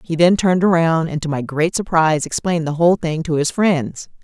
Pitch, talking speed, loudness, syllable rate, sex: 165 Hz, 225 wpm, -17 LUFS, 5.7 syllables/s, female